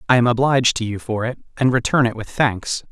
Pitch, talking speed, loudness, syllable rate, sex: 120 Hz, 245 wpm, -19 LUFS, 6.0 syllables/s, male